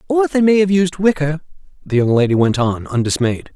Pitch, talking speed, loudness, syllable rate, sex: 155 Hz, 205 wpm, -16 LUFS, 5.4 syllables/s, male